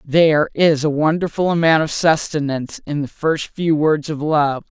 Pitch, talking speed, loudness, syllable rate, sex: 155 Hz, 175 wpm, -18 LUFS, 4.7 syllables/s, female